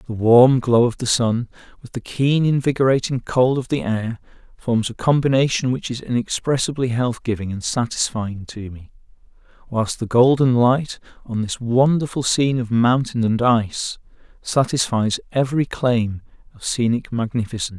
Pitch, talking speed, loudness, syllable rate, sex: 120 Hz, 150 wpm, -19 LUFS, 4.8 syllables/s, male